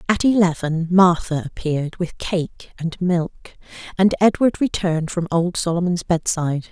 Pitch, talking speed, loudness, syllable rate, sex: 175 Hz, 135 wpm, -20 LUFS, 4.8 syllables/s, female